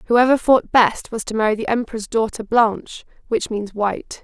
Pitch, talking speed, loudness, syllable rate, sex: 220 Hz, 185 wpm, -19 LUFS, 5.1 syllables/s, female